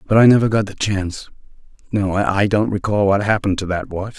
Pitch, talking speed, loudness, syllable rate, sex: 100 Hz, 215 wpm, -18 LUFS, 5.8 syllables/s, male